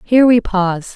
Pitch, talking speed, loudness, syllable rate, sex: 210 Hz, 190 wpm, -14 LUFS, 5.9 syllables/s, female